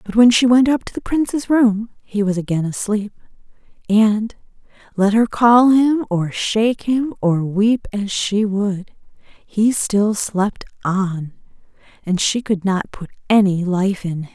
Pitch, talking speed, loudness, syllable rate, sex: 210 Hz, 165 wpm, -17 LUFS, 3.9 syllables/s, female